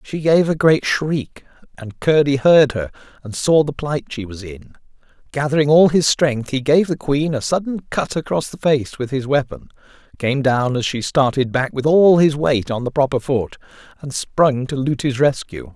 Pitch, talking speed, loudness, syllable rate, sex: 140 Hz, 200 wpm, -17 LUFS, 4.6 syllables/s, male